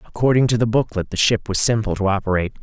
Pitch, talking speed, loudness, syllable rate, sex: 110 Hz, 230 wpm, -19 LUFS, 7.1 syllables/s, male